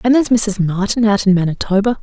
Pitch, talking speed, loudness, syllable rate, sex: 210 Hz, 205 wpm, -15 LUFS, 6.2 syllables/s, female